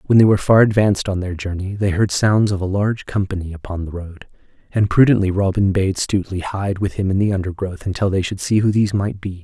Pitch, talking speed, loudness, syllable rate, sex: 95 Hz, 235 wpm, -18 LUFS, 6.1 syllables/s, male